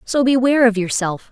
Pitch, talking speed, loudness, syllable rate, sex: 235 Hz, 180 wpm, -16 LUFS, 5.8 syllables/s, female